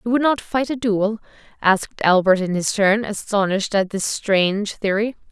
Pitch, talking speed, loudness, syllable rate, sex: 210 Hz, 180 wpm, -19 LUFS, 5.0 syllables/s, female